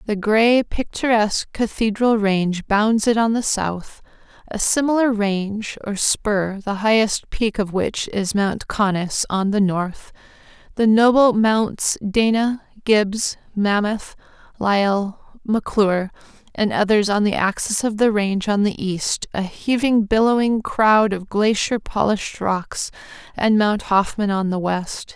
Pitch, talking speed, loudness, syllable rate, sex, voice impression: 210 Hz, 140 wpm, -19 LUFS, 4.0 syllables/s, female, feminine, adult-like, tensed, soft, slightly halting, calm, friendly, reassuring, elegant, kind